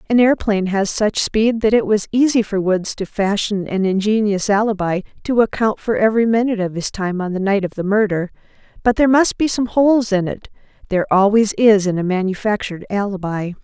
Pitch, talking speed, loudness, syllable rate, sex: 205 Hz, 200 wpm, -17 LUFS, 5.8 syllables/s, female